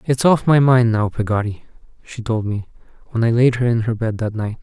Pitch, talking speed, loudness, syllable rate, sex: 115 Hz, 235 wpm, -18 LUFS, 5.5 syllables/s, male